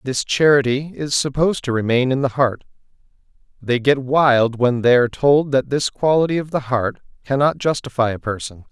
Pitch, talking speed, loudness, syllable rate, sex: 130 Hz, 180 wpm, -18 LUFS, 5.2 syllables/s, male